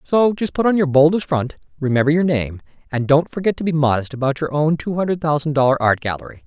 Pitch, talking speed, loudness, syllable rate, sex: 150 Hz, 230 wpm, -18 LUFS, 6.2 syllables/s, male